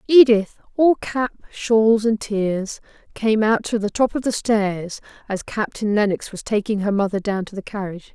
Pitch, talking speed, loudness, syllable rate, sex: 215 Hz, 185 wpm, -20 LUFS, 4.6 syllables/s, female